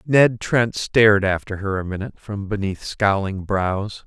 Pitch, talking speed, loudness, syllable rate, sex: 100 Hz, 160 wpm, -20 LUFS, 4.3 syllables/s, male